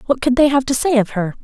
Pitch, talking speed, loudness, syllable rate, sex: 250 Hz, 335 wpm, -16 LUFS, 6.6 syllables/s, female